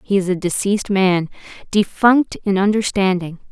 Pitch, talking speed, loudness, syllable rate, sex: 195 Hz, 120 wpm, -17 LUFS, 4.9 syllables/s, female